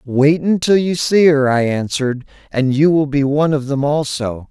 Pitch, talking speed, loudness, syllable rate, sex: 145 Hz, 200 wpm, -15 LUFS, 4.8 syllables/s, male